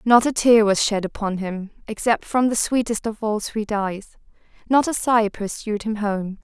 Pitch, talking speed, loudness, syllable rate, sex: 215 Hz, 195 wpm, -21 LUFS, 4.4 syllables/s, female